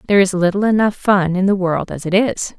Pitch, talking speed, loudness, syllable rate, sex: 190 Hz, 255 wpm, -16 LUFS, 5.8 syllables/s, female